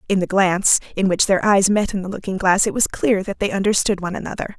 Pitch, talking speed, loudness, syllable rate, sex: 195 Hz, 260 wpm, -18 LUFS, 6.4 syllables/s, female